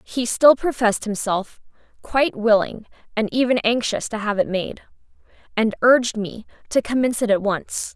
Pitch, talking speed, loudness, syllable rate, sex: 225 Hz, 160 wpm, -20 LUFS, 5.1 syllables/s, female